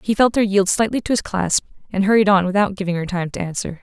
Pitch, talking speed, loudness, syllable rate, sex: 195 Hz, 265 wpm, -19 LUFS, 6.3 syllables/s, female